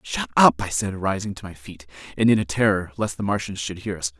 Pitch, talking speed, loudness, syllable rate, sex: 95 Hz, 260 wpm, -22 LUFS, 5.8 syllables/s, male